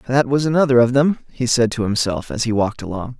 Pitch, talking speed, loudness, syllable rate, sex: 125 Hz, 245 wpm, -18 LUFS, 6.2 syllables/s, male